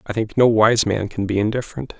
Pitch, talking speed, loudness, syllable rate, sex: 110 Hz, 240 wpm, -18 LUFS, 6.0 syllables/s, male